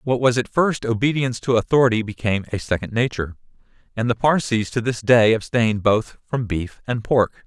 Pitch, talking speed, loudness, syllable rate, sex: 115 Hz, 185 wpm, -20 LUFS, 5.5 syllables/s, male